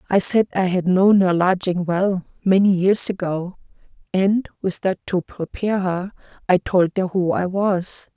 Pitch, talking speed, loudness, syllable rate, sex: 185 Hz, 160 wpm, -19 LUFS, 4.3 syllables/s, female